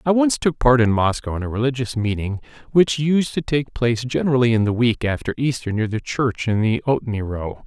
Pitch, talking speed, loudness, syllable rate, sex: 125 Hz, 220 wpm, -20 LUFS, 5.6 syllables/s, male